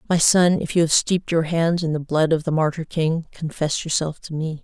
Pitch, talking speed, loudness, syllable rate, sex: 160 Hz, 245 wpm, -21 LUFS, 5.2 syllables/s, female